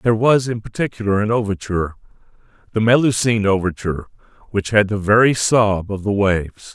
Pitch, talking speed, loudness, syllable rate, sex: 105 Hz, 135 wpm, -18 LUFS, 5.8 syllables/s, male